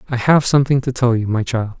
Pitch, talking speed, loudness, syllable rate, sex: 125 Hz, 265 wpm, -16 LUFS, 6.4 syllables/s, male